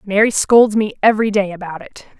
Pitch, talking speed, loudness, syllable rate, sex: 205 Hz, 190 wpm, -14 LUFS, 5.7 syllables/s, female